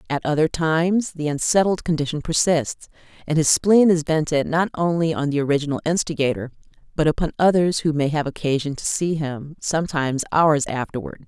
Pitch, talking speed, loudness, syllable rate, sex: 155 Hz, 165 wpm, -21 LUFS, 5.5 syllables/s, female